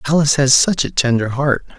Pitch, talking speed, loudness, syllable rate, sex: 140 Hz, 200 wpm, -15 LUFS, 5.7 syllables/s, male